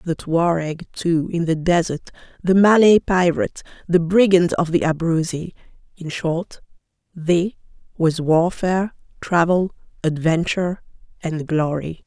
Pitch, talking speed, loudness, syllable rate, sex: 170 Hz, 110 wpm, -19 LUFS, 4.2 syllables/s, female